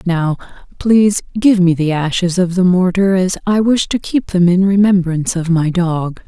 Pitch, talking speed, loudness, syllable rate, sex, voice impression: 185 Hz, 190 wpm, -14 LUFS, 4.7 syllables/s, female, feminine, very adult-like, intellectual, calm, slightly sweet